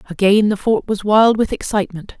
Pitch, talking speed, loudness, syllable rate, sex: 205 Hz, 190 wpm, -16 LUFS, 5.6 syllables/s, female